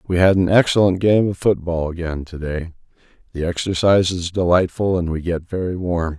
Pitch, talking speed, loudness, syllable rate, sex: 90 Hz, 175 wpm, -19 LUFS, 5.4 syllables/s, male